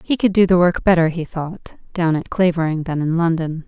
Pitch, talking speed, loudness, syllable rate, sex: 170 Hz, 230 wpm, -18 LUFS, 5.3 syllables/s, female